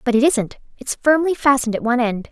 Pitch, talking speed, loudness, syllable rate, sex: 255 Hz, 210 wpm, -18 LUFS, 6.0 syllables/s, female